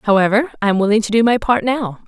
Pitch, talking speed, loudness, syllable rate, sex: 220 Hz, 260 wpm, -16 LUFS, 6.2 syllables/s, female